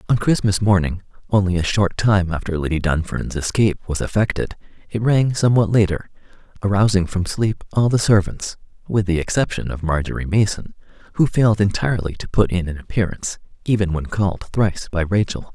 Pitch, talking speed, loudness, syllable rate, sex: 100 Hz, 165 wpm, -20 LUFS, 5.8 syllables/s, male